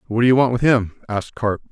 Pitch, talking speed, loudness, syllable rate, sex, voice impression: 115 Hz, 280 wpm, -18 LUFS, 6.8 syllables/s, male, masculine, adult-like, slightly relaxed, powerful, muffled, slightly raspy, cool, intellectual, sincere, slightly mature, reassuring, wild, lively, slightly strict